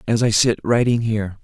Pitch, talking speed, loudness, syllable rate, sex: 110 Hz, 210 wpm, -18 LUFS, 5.5 syllables/s, male